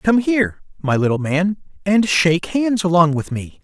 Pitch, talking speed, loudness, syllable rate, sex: 180 Hz, 180 wpm, -18 LUFS, 4.7 syllables/s, male